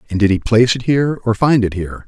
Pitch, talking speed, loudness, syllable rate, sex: 115 Hz, 290 wpm, -15 LUFS, 7.0 syllables/s, male